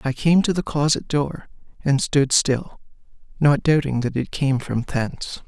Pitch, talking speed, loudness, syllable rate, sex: 140 Hz, 175 wpm, -21 LUFS, 4.4 syllables/s, male